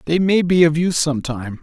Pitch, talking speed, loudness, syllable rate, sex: 160 Hz, 260 wpm, -17 LUFS, 5.4 syllables/s, male